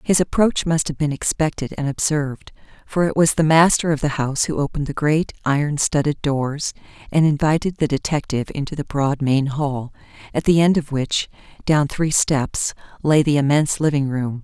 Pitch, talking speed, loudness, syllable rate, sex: 145 Hz, 185 wpm, -20 LUFS, 5.2 syllables/s, female